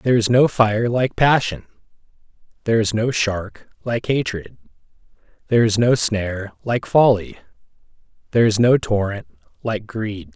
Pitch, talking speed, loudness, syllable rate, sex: 110 Hz, 140 wpm, -19 LUFS, 4.7 syllables/s, male